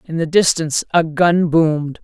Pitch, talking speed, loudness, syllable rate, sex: 160 Hz, 175 wpm, -16 LUFS, 5.0 syllables/s, female